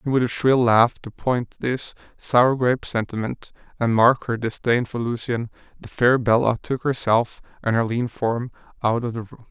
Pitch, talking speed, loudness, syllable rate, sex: 120 Hz, 190 wpm, -21 LUFS, 4.7 syllables/s, male